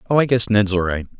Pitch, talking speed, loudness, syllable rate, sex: 105 Hz, 300 wpm, -18 LUFS, 6.7 syllables/s, male